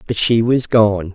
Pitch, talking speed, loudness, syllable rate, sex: 110 Hz, 210 wpm, -15 LUFS, 4.0 syllables/s, female